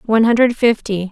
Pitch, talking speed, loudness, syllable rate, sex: 220 Hz, 160 wpm, -15 LUFS, 5.6 syllables/s, female